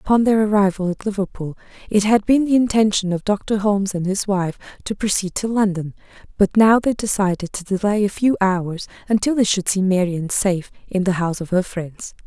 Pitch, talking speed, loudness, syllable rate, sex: 200 Hz, 200 wpm, -19 LUFS, 5.4 syllables/s, female